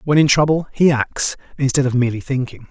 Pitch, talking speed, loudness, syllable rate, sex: 135 Hz, 200 wpm, -17 LUFS, 6.0 syllables/s, male